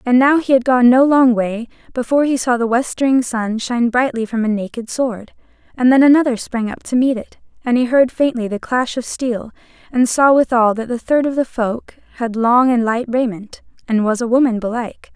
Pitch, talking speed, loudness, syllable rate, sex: 245 Hz, 220 wpm, -16 LUFS, 5.3 syllables/s, female